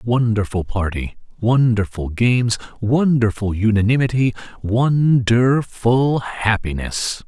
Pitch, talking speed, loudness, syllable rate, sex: 115 Hz, 80 wpm, -18 LUFS, 3.7 syllables/s, male